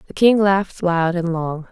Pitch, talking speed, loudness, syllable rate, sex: 180 Hz, 210 wpm, -18 LUFS, 4.6 syllables/s, female